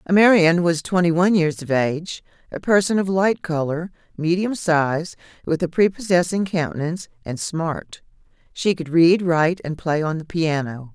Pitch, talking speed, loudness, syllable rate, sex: 170 Hz, 160 wpm, -20 LUFS, 4.8 syllables/s, female